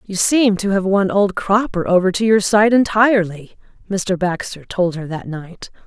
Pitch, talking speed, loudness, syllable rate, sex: 195 Hz, 185 wpm, -16 LUFS, 4.5 syllables/s, female